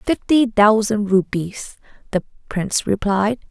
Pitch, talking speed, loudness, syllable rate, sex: 210 Hz, 105 wpm, -19 LUFS, 3.9 syllables/s, female